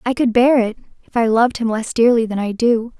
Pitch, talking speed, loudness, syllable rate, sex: 230 Hz, 260 wpm, -17 LUFS, 5.8 syllables/s, female